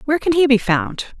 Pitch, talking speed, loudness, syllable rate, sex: 255 Hz, 250 wpm, -16 LUFS, 6.3 syllables/s, female